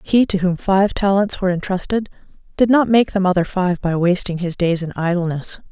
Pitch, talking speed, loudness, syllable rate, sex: 185 Hz, 200 wpm, -18 LUFS, 5.4 syllables/s, female